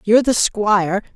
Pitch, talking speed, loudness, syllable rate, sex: 210 Hz, 155 wpm, -17 LUFS, 5.2 syllables/s, female